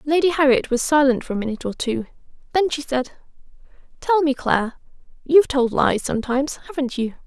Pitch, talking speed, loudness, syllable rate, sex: 270 Hz, 165 wpm, -20 LUFS, 6.1 syllables/s, female